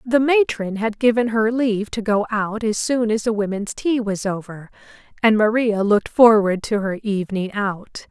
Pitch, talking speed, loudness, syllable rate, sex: 215 Hz, 185 wpm, -19 LUFS, 4.7 syllables/s, female